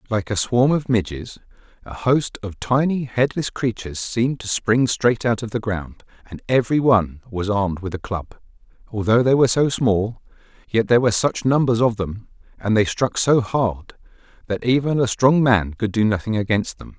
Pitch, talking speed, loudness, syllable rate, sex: 115 Hz, 190 wpm, -20 LUFS, 5.1 syllables/s, male